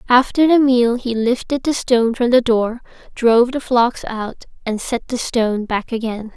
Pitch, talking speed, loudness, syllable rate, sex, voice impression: 240 Hz, 190 wpm, -17 LUFS, 4.7 syllables/s, female, feminine, slightly adult-like, slightly powerful, slightly cute, slightly intellectual, slightly calm